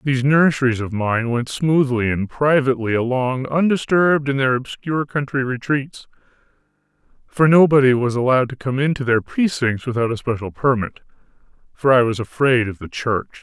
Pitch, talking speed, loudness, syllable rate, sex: 130 Hz, 150 wpm, -18 LUFS, 5.2 syllables/s, male